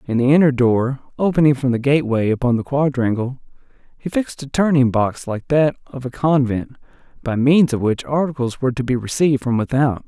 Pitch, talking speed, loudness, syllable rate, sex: 135 Hz, 190 wpm, -18 LUFS, 5.7 syllables/s, male